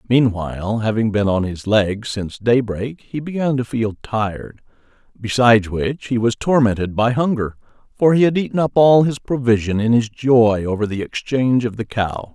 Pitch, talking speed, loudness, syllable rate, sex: 115 Hz, 180 wpm, -18 LUFS, 5.0 syllables/s, male